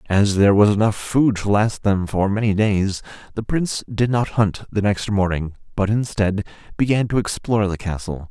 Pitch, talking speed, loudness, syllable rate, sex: 105 Hz, 190 wpm, -20 LUFS, 5.0 syllables/s, male